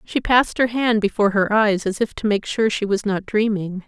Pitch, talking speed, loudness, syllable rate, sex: 210 Hz, 250 wpm, -19 LUFS, 5.3 syllables/s, female